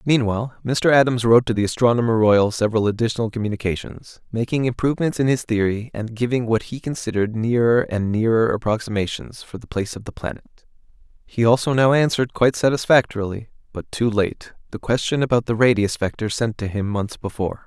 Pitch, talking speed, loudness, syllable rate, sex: 115 Hz, 175 wpm, -20 LUFS, 6.2 syllables/s, male